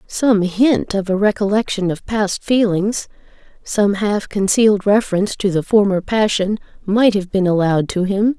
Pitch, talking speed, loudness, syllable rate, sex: 200 Hz, 155 wpm, -17 LUFS, 4.7 syllables/s, female